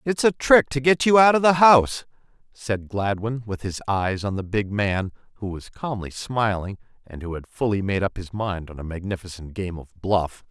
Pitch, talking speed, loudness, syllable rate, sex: 110 Hz, 210 wpm, -22 LUFS, 4.9 syllables/s, male